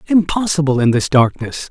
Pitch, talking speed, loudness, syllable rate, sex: 150 Hz, 140 wpm, -15 LUFS, 5.2 syllables/s, male